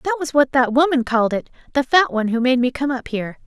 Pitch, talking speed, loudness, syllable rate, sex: 260 Hz, 260 wpm, -18 LUFS, 6.6 syllables/s, female